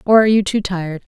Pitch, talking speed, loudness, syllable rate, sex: 195 Hz, 260 wpm, -16 LUFS, 7.5 syllables/s, female